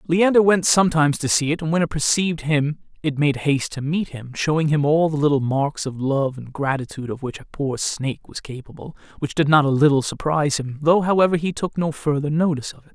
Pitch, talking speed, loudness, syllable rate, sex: 150 Hz, 230 wpm, -20 LUFS, 6.0 syllables/s, male